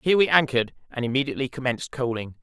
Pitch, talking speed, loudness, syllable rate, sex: 130 Hz, 175 wpm, -24 LUFS, 8.5 syllables/s, male